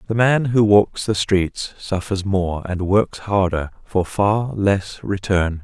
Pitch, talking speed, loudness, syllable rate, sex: 100 Hz, 160 wpm, -19 LUFS, 3.5 syllables/s, male